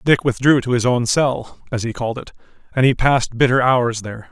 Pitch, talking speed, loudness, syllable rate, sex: 125 Hz, 225 wpm, -18 LUFS, 5.7 syllables/s, male